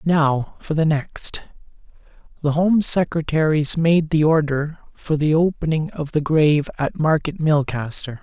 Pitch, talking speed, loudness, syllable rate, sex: 155 Hz, 140 wpm, -19 LUFS, 4.2 syllables/s, male